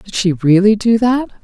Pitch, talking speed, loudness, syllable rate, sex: 205 Hz, 210 wpm, -13 LUFS, 4.7 syllables/s, female